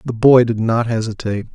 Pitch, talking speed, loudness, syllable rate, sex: 115 Hz, 195 wpm, -16 LUFS, 5.7 syllables/s, male